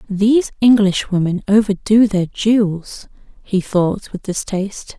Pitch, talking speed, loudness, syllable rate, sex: 205 Hz, 110 wpm, -16 LUFS, 4.1 syllables/s, female